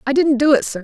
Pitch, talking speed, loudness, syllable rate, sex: 275 Hz, 360 wpm, -15 LUFS, 7.0 syllables/s, female